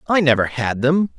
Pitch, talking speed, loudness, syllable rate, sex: 135 Hz, 205 wpm, -18 LUFS, 5.2 syllables/s, male